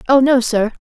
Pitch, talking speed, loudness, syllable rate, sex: 250 Hz, 215 wpm, -14 LUFS, 5.4 syllables/s, female